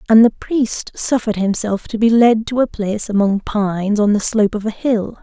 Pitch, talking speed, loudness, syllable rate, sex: 215 Hz, 220 wpm, -16 LUFS, 5.2 syllables/s, female